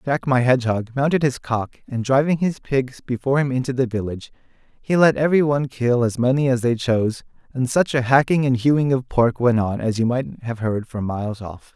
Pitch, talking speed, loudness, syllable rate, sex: 125 Hz, 220 wpm, -20 LUFS, 5.6 syllables/s, male